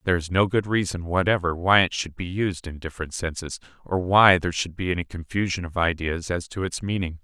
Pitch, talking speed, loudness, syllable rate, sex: 90 Hz, 225 wpm, -24 LUFS, 5.8 syllables/s, male